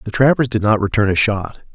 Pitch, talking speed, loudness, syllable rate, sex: 110 Hz, 240 wpm, -16 LUFS, 5.9 syllables/s, male